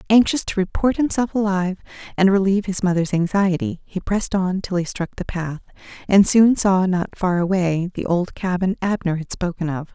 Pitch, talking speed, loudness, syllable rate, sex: 185 Hz, 185 wpm, -20 LUFS, 5.2 syllables/s, female